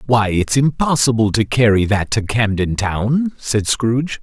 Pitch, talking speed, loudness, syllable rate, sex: 115 Hz, 155 wpm, -16 LUFS, 4.2 syllables/s, male